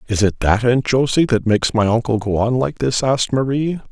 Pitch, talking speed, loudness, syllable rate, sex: 120 Hz, 230 wpm, -17 LUFS, 5.5 syllables/s, male